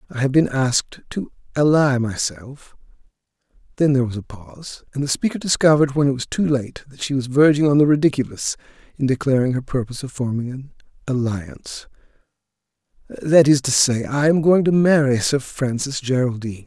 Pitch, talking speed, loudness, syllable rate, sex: 135 Hz, 170 wpm, -19 LUFS, 5.6 syllables/s, male